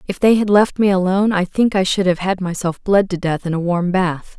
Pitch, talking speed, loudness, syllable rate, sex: 185 Hz, 275 wpm, -17 LUFS, 5.4 syllables/s, female